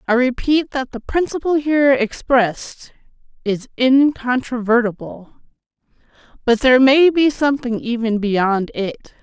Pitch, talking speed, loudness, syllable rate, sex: 250 Hz, 110 wpm, -17 LUFS, 4.5 syllables/s, female